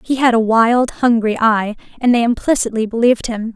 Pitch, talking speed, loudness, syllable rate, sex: 230 Hz, 185 wpm, -15 LUFS, 5.3 syllables/s, female